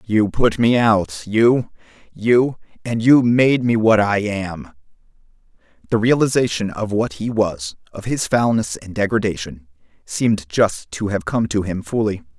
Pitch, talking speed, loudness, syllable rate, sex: 105 Hz, 145 wpm, -18 LUFS, 4.2 syllables/s, male